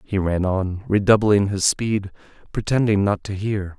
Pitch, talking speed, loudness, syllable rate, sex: 100 Hz, 160 wpm, -20 LUFS, 4.3 syllables/s, male